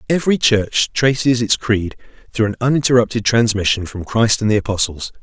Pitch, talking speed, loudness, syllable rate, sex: 115 Hz, 160 wpm, -16 LUFS, 5.5 syllables/s, male